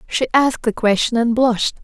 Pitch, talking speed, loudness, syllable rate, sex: 235 Hz, 195 wpm, -17 LUFS, 5.8 syllables/s, female